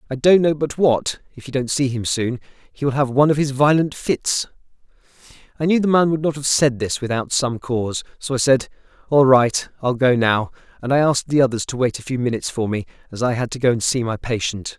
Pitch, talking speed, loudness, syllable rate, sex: 130 Hz, 245 wpm, -19 LUFS, 5.8 syllables/s, male